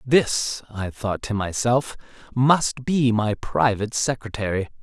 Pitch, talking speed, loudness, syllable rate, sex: 115 Hz, 125 wpm, -22 LUFS, 3.9 syllables/s, male